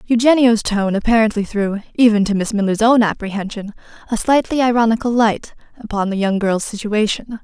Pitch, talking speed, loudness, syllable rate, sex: 220 Hz, 155 wpm, -16 LUFS, 5.5 syllables/s, female